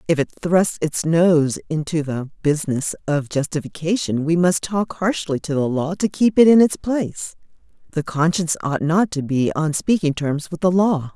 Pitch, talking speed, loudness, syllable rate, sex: 165 Hz, 190 wpm, -19 LUFS, 4.7 syllables/s, female